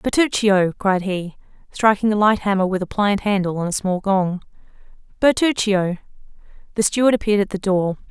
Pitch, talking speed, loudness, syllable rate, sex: 200 Hz, 165 wpm, -19 LUFS, 5.3 syllables/s, female